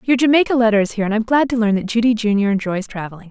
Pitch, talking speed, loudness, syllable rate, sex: 220 Hz, 270 wpm, -17 LUFS, 7.5 syllables/s, female